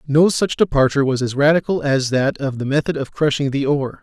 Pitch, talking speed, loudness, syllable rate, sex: 145 Hz, 225 wpm, -18 LUFS, 5.9 syllables/s, male